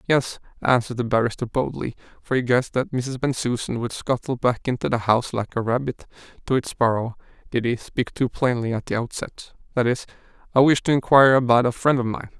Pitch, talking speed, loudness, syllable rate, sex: 125 Hz, 200 wpm, -22 LUFS, 5.9 syllables/s, male